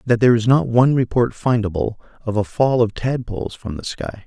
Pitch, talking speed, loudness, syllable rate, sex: 115 Hz, 210 wpm, -19 LUFS, 5.7 syllables/s, male